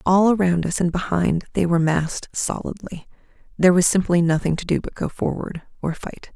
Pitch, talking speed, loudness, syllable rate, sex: 175 Hz, 170 wpm, -21 LUFS, 5.5 syllables/s, female